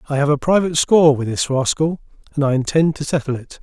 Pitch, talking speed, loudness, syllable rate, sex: 145 Hz, 230 wpm, -17 LUFS, 6.4 syllables/s, male